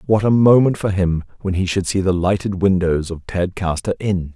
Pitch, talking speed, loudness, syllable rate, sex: 95 Hz, 205 wpm, -18 LUFS, 5.1 syllables/s, male